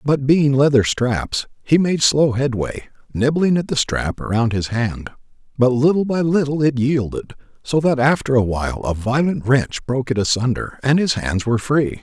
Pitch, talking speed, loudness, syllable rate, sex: 135 Hz, 180 wpm, -18 LUFS, 4.8 syllables/s, male